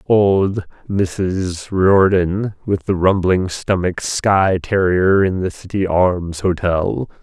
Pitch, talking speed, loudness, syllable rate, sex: 95 Hz, 115 wpm, -17 LUFS, 3.0 syllables/s, male